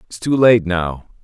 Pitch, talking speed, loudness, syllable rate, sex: 100 Hz, 195 wpm, -16 LUFS, 3.9 syllables/s, male